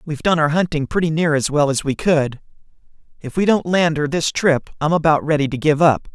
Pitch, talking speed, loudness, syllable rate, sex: 155 Hz, 235 wpm, -18 LUFS, 5.6 syllables/s, male